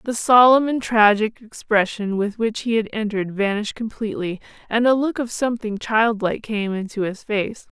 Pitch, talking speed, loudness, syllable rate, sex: 220 Hz, 170 wpm, -20 LUFS, 5.2 syllables/s, female